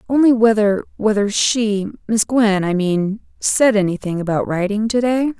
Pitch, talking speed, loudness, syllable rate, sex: 210 Hz, 120 wpm, -17 LUFS, 4.5 syllables/s, female